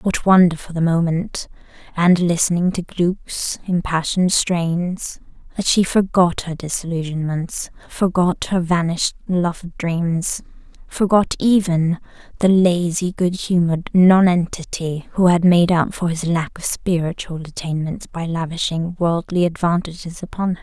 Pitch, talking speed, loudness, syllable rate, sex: 175 Hz, 130 wpm, -19 LUFS, 4.3 syllables/s, female